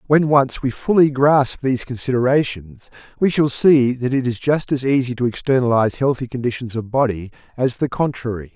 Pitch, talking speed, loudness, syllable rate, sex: 130 Hz, 175 wpm, -18 LUFS, 5.3 syllables/s, male